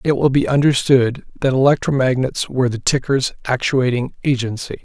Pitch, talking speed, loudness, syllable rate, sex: 130 Hz, 135 wpm, -17 LUFS, 5.3 syllables/s, male